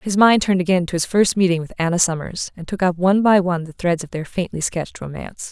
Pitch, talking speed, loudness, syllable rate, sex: 180 Hz, 260 wpm, -19 LUFS, 6.5 syllables/s, female